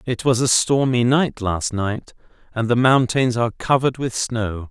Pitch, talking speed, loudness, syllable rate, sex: 120 Hz, 180 wpm, -19 LUFS, 4.5 syllables/s, male